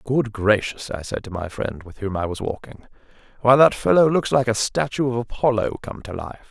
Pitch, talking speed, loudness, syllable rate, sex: 115 Hz, 220 wpm, -21 LUFS, 5.3 syllables/s, male